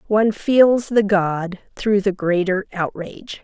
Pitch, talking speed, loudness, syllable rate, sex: 200 Hz, 140 wpm, -18 LUFS, 4.0 syllables/s, female